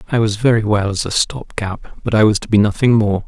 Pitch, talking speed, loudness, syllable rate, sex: 110 Hz, 255 wpm, -16 LUFS, 5.6 syllables/s, male